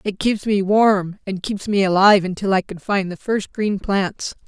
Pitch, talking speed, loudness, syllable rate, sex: 195 Hz, 215 wpm, -19 LUFS, 4.5 syllables/s, female